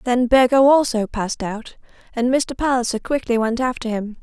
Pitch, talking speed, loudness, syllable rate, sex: 245 Hz, 170 wpm, -19 LUFS, 5.1 syllables/s, female